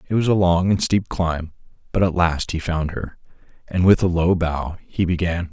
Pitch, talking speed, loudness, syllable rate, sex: 90 Hz, 215 wpm, -20 LUFS, 4.8 syllables/s, male